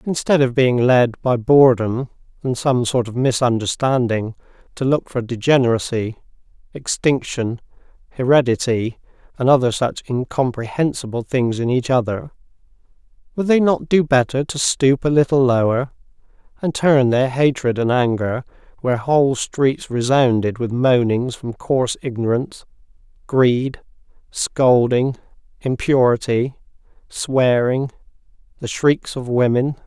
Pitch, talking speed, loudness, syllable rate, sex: 125 Hz, 115 wpm, -18 LUFS, 4.5 syllables/s, male